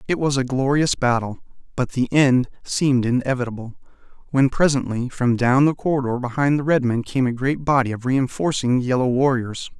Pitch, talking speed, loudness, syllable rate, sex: 130 Hz, 170 wpm, -20 LUFS, 5.3 syllables/s, male